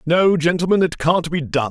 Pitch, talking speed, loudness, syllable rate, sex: 165 Hz, 210 wpm, -18 LUFS, 4.8 syllables/s, male